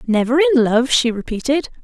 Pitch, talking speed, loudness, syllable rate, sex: 255 Hz, 165 wpm, -16 LUFS, 5.4 syllables/s, female